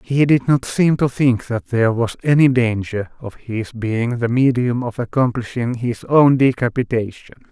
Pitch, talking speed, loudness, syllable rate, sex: 120 Hz, 170 wpm, -18 LUFS, 4.4 syllables/s, male